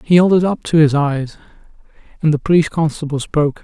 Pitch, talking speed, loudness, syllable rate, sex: 155 Hz, 200 wpm, -15 LUFS, 6.3 syllables/s, male